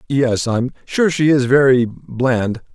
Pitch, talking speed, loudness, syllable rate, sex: 130 Hz, 130 wpm, -16 LUFS, 3.0 syllables/s, male